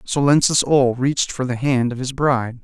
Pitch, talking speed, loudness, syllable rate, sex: 130 Hz, 205 wpm, -18 LUFS, 5.2 syllables/s, male